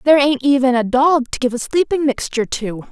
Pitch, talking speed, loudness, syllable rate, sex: 265 Hz, 225 wpm, -16 LUFS, 5.7 syllables/s, female